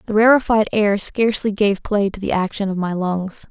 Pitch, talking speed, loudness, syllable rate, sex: 205 Hz, 205 wpm, -18 LUFS, 5.2 syllables/s, female